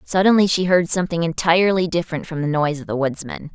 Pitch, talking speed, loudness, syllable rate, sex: 170 Hz, 205 wpm, -19 LUFS, 6.7 syllables/s, female